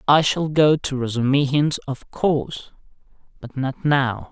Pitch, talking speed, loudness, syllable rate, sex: 140 Hz, 140 wpm, -20 LUFS, 4.1 syllables/s, male